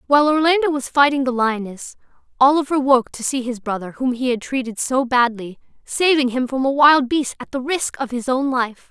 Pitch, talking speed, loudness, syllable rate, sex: 260 Hz, 210 wpm, -18 LUFS, 5.2 syllables/s, female